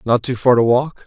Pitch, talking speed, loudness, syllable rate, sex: 125 Hz, 280 wpm, -16 LUFS, 5.4 syllables/s, male